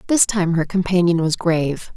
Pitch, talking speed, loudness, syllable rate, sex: 175 Hz, 185 wpm, -18 LUFS, 5.1 syllables/s, female